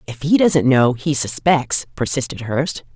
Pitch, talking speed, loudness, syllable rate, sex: 140 Hz, 165 wpm, -17 LUFS, 4.2 syllables/s, female